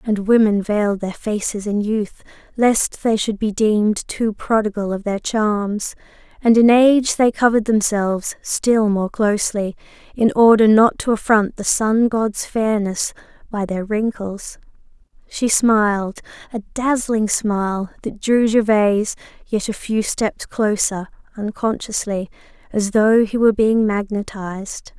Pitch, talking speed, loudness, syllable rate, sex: 215 Hz, 140 wpm, -18 LUFS, 4.2 syllables/s, female